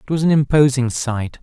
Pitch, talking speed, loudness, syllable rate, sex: 135 Hz, 210 wpm, -17 LUFS, 5.3 syllables/s, male